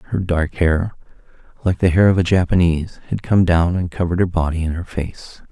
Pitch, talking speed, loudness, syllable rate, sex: 85 Hz, 205 wpm, -18 LUFS, 5.8 syllables/s, male